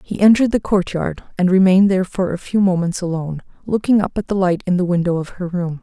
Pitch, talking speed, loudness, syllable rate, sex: 185 Hz, 235 wpm, -17 LUFS, 6.4 syllables/s, female